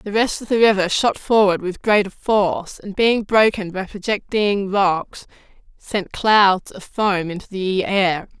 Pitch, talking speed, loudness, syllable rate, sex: 200 Hz, 165 wpm, -18 LUFS, 4.1 syllables/s, female